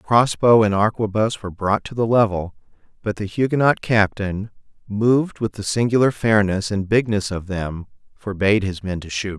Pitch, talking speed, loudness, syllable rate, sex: 105 Hz, 175 wpm, -20 LUFS, 5.1 syllables/s, male